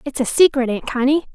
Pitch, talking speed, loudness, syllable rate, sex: 265 Hz, 225 wpm, -17 LUFS, 5.8 syllables/s, female